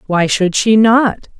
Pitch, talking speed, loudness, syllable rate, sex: 205 Hz, 175 wpm, -12 LUFS, 3.4 syllables/s, female